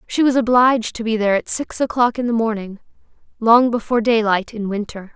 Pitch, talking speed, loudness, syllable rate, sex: 225 Hz, 185 wpm, -18 LUFS, 5.9 syllables/s, female